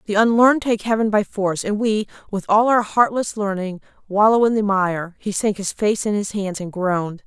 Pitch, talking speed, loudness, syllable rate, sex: 205 Hz, 215 wpm, -19 LUFS, 5.2 syllables/s, female